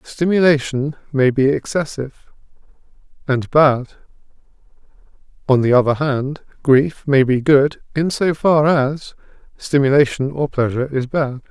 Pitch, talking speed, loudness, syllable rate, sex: 140 Hz, 120 wpm, -17 LUFS, 4.4 syllables/s, male